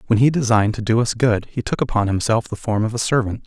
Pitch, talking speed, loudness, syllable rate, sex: 115 Hz, 275 wpm, -19 LUFS, 6.5 syllables/s, male